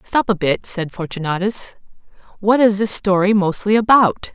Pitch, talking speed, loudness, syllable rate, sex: 200 Hz, 150 wpm, -17 LUFS, 4.7 syllables/s, female